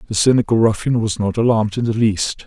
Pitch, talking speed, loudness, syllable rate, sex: 110 Hz, 220 wpm, -17 LUFS, 6.1 syllables/s, male